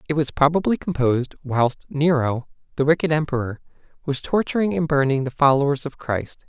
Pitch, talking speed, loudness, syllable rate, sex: 145 Hz, 155 wpm, -21 LUFS, 5.6 syllables/s, male